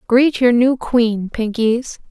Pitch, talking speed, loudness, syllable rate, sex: 240 Hz, 140 wpm, -16 LUFS, 3.3 syllables/s, female